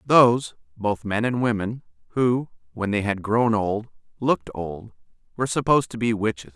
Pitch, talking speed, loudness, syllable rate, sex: 110 Hz, 165 wpm, -23 LUFS, 5.1 syllables/s, male